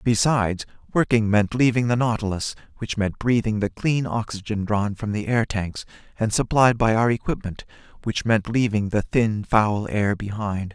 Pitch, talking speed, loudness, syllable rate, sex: 110 Hz, 165 wpm, -22 LUFS, 4.7 syllables/s, male